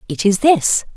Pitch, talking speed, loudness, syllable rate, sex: 220 Hz, 190 wpm, -15 LUFS, 4.2 syllables/s, female